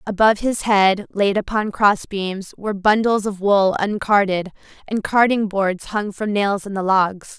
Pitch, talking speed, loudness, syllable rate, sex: 205 Hz, 170 wpm, -19 LUFS, 4.7 syllables/s, female